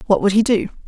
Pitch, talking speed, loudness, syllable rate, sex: 205 Hz, 275 wpm, -17 LUFS, 7.1 syllables/s, female